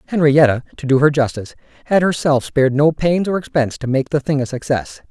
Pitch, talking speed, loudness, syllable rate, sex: 140 Hz, 210 wpm, -17 LUFS, 6.3 syllables/s, male